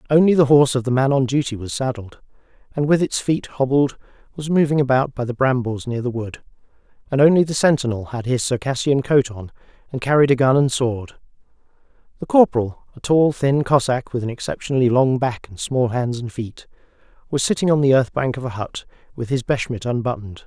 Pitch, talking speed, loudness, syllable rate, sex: 130 Hz, 200 wpm, -19 LUFS, 5.7 syllables/s, male